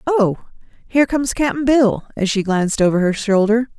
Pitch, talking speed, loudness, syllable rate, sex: 225 Hz, 175 wpm, -17 LUFS, 5.1 syllables/s, female